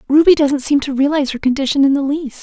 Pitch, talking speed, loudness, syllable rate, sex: 280 Hz, 250 wpm, -15 LUFS, 6.5 syllables/s, female